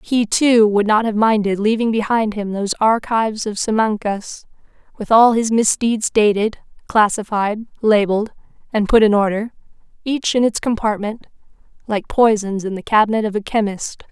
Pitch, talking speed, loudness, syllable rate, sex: 215 Hz, 155 wpm, -17 LUFS, 4.9 syllables/s, female